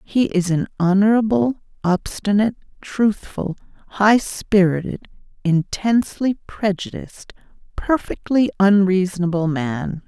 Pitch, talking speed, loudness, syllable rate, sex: 195 Hz, 75 wpm, -19 LUFS, 4.2 syllables/s, female